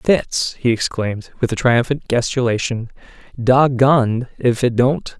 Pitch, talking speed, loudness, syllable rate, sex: 125 Hz, 140 wpm, -17 LUFS, 4.6 syllables/s, male